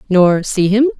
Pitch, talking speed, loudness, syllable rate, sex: 210 Hz, 180 wpm, -13 LUFS, 4.0 syllables/s, female